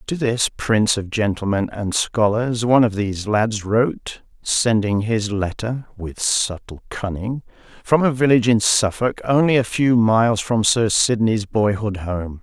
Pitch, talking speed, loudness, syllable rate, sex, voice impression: 110 Hz, 155 wpm, -19 LUFS, 4.2 syllables/s, male, masculine, middle-aged, tensed, powerful, hard, clear, cool, calm, mature, friendly, wild, lively, slightly strict